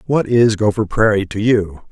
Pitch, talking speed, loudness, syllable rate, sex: 105 Hz, 190 wpm, -15 LUFS, 4.7 syllables/s, male